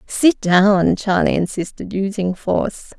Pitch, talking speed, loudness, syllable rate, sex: 195 Hz, 120 wpm, -18 LUFS, 4.0 syllables/s, female